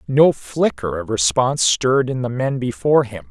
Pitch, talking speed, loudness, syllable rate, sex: 120 Hz, 180 wpm, -18 LUFS, 5.1 syllables/s, male